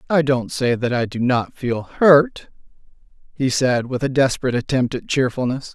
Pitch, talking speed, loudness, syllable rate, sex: 130 Hz, 175 wpm, -19 LUFS, 4.9 syllables/s, male